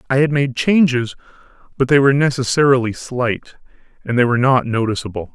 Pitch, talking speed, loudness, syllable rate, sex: 130 Hz, 155 wpm, -16 LUFS, 5.9 syllables/s, male